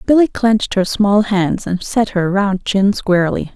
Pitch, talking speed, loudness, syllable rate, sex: 200 Hz, 185 wpm, -15 LUFS, 4.4 syllables/s, female